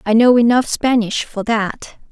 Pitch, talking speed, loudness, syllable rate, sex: 230 Hz, 170 wpm, -15 LUFS, 4.2 syllables/s, female